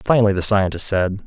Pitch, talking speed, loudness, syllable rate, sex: 100 Hz, 190 wpm, -17 LUFS, 6.1 syllables/s, male